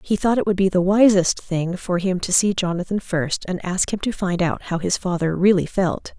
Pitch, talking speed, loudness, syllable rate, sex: 185 Hz, 245 wpm, -20 LUFS, 5.0 syllables/s, female